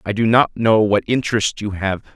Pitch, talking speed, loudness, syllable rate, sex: 110 Hz, 225 wpm, -17 LUFS, 5.8 syllables/s, male